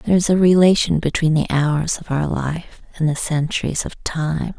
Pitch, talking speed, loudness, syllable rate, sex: 160 Hz, 195 wpm, -18 LUFS, 4.8 syllables/s, female